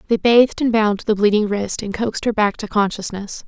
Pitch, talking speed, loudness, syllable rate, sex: 215 Hz, 225 wpm, -18 LUFS, 5.8 syllables/s, female